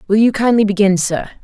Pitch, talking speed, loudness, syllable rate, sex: 205 Hz, 210 wpm, -14 LUFS, 6.0 syllables/s, female